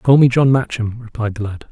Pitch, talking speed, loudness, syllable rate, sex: 120 Hz, 245 wpm, -17 LUFS, 5.5 syllables/s, male